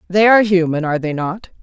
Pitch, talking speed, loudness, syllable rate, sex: 180 Hz, 220 wpm, -15 LUFS, 6.6 syllables/s, female